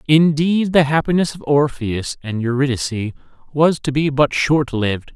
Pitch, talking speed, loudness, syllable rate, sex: 140 Hz, 140 wpm, -18 LUFS, 4.8 syllables/s, male